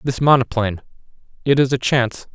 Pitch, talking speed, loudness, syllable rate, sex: 125 Hz, 130 wpm, -18 LUFS, 6.2 syllables/s, male